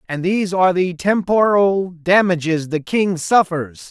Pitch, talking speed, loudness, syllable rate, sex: 180 Hz, 140 wpm, -17 LUFS, 4.3 syllables/s, male